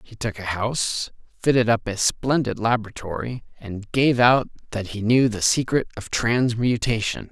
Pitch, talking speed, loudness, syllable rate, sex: 115 Hz, 155 wpm, -22 LUFS, 4.6 syllables/s, male